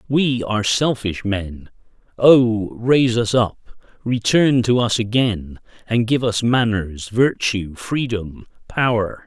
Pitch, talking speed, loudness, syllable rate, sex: 115 Hz, 125 wpm, -18 LUFS, 3.7 syllables/s, male